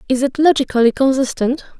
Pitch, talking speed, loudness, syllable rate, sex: 265 Hz, 135 wpm, -16 LUFS, 6.1 syllables/s, female